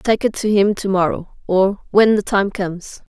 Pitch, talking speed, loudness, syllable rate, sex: 200 Hz, 210 wpm, -17 LUFS, 4.6 syllables/s, female